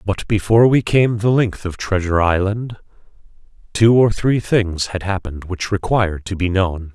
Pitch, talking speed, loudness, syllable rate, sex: 100 Hz, 175 wpm, -17 LUFS, 4.9 syllables/s, male